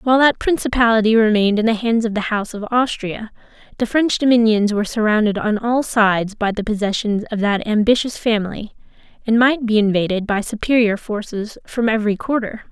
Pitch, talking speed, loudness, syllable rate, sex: 220 Hz, 175 wpm, -18 LUFS, 5.8 syllables/s, female